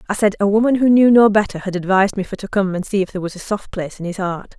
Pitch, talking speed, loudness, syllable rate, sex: 200 Hz, 325 wpm, -17 LUFS, 7.1 syllables/s, female